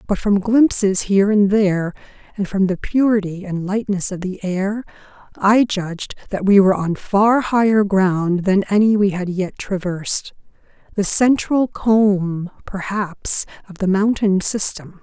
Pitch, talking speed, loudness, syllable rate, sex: 200 Hz, 150 wpm, -18 LUFS, 4.3 syllables/s, female